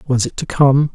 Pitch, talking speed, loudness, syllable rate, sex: 135 Hz, 255 wpm, -15 LUFS, 5.1 syllables/s, male